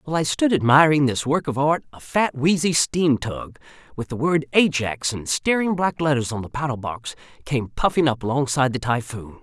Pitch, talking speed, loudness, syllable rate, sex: 140 Hz, 185 wpm, -21 LUFS, 5.2 syllables/s, male